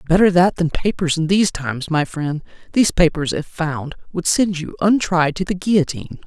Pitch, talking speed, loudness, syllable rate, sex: 170 Hz, 190 wpm, -18 LUFS, 5.6 syllables/s, female